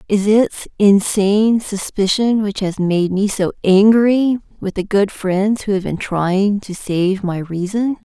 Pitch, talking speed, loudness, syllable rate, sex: 200 Hz, 165 wpm, -16 LUFS, 3.9 syllables/s, female